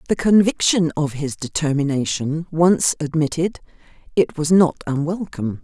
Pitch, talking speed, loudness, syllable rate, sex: 155 Hz, 115 wpm, -19 LUFS, 4.7 syllables/s, female